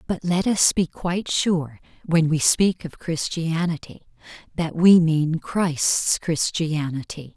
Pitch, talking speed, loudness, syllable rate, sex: 165 Hz, 130 wpm, -21 LUFS, 3.6 syllables/s, female